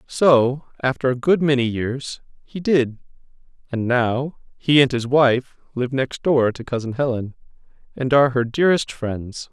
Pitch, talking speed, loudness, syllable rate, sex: 130 Hz, 160 wpm, -20 LUFS, 4.3 syllables/s, male